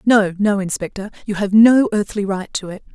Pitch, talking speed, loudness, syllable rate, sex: 205 Hz, 205 wpm, -17 LUFS, 5.1 syllables/s, female